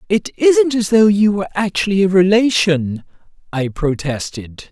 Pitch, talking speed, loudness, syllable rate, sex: 190 Hz, 140 wpm, -15 LUFS, 4.6 syllables/s, male